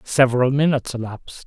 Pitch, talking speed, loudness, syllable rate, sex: 130 Hz, 125 wpm, -19 LUFS, 6.7 syllables/s, male